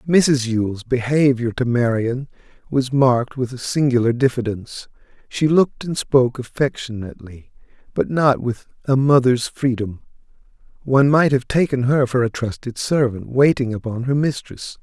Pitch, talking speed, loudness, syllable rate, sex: 125 Hz, 140 wpm, -19 LUFS, 4.9 syllables/s, male